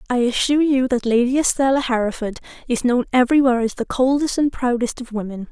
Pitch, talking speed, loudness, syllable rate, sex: 250 Hz, 185 wpm, -19 LUFS, 6.3 syllables/s, female